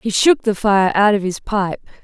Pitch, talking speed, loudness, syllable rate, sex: 205 Hz, 235 wpm, -16 LUFS, 4.5 syllables/s, female